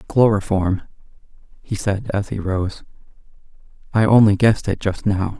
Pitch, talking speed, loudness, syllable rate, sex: 100 Hz, 135 wpm, -19 LUFS, 4.7 syllables/s, male